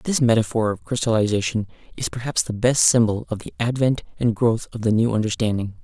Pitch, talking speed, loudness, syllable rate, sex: 115 Hz, 185 wpm, -21 LUFS, 5.7 syllables/s, male